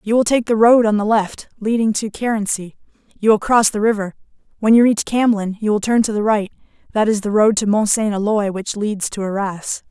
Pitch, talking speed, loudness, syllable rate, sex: 215 Hz, 230 wpm, -17 LUFS, 5.4 syllables/s, female